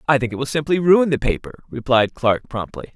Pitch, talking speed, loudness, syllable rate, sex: 140 Hz, 225 wpm, -19 LUFS, 5.6 syllables/s, male